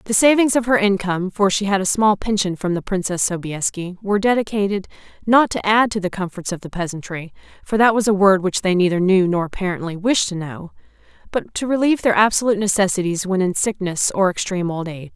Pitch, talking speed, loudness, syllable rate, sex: 195 Hz, 210 wpm, -19 LUFS, 6.1 syllables/s, female